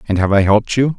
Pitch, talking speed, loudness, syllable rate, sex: 110 Hz, 305 wpm, -14 LUFS, 7.2 syllables/s, male